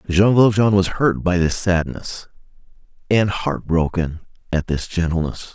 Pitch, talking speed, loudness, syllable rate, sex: 90 Hz, 140 wpm, -19 LUFS, 4.2 syllables/s, male